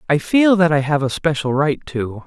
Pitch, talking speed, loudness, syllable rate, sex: 155 Hz, 240 wpm, -17 LUFS, 4.8 syllables/s, male